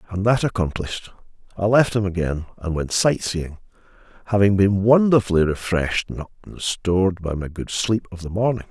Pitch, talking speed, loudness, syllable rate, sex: 95 Hz, 170 wpm, -21 LUFS, 5.5 syllables/s, male